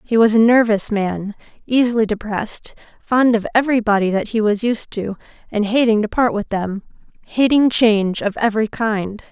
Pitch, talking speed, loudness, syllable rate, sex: 220 Hz, 175 wpm, -17 LUFS, 5.1 syllables/s, female